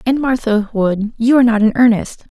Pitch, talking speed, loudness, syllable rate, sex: 230 Hz, 180 wpm, -14 LUFS, 5.3 syllables/s, female